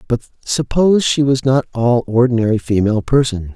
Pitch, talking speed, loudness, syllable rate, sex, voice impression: 120 Hz, 150 wpm, -15 LUFS, 5.3 syllables/s, male, masculine, middle-aged, slightly relaxed, powerful, slightly hard, raspy, cool, intellectual, calm, mature, reassuring, wild, lively, slightly kind, slightly modest